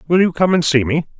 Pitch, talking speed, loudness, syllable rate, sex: 160 Hz, 300 wpm, -15 LUFS, 6.5 syllables/s, male